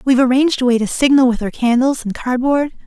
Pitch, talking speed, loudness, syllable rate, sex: 255 Hz, 250 wpm, -15 LUFS, 6.4 syllables/s, female